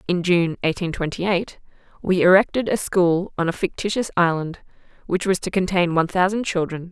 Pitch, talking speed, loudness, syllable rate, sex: 180 Hz, 175 wpm, -21 LUFS, 5.4 syllables/s, female